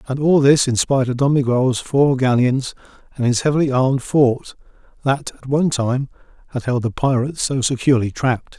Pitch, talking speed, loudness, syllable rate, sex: 130 Hz, 180 wpm, -18 LUFS, 5.6 syllables/s, male